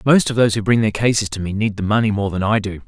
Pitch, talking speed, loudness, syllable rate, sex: 105 Hz, 335 wpm, -18 LUFS, 7.0 syllables/s, male